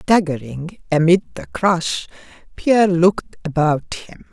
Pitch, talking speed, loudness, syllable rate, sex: 175 Hz, 110 wpm, -18 LUFS, 4.1 syllables/s, female